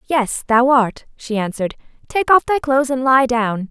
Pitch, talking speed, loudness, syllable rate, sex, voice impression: 255 Hz, 195 wpm, -17 LUFS, 4.7 syllables/s, female, feminine, slightly young, slightly cute, friendly, slightly kind